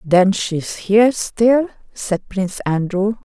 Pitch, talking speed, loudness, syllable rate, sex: 200 Hz, 145 wpm, -17 LUFS, 3.8 syllables/s, female